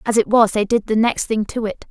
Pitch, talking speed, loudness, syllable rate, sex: 220 Hz, 315 wpm, -18 LUFS, 5.6 syllables/s, female